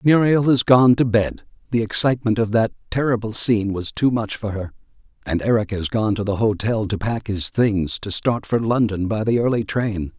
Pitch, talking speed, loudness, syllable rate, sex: 110 Hz, 195 wpm, -20 LUFS, 5.1 syllables/s, male